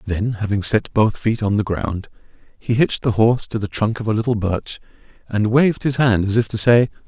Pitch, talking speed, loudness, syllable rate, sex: 110 Hz, 230 wpm, -18 LUFS, 5.5 syllables/s, male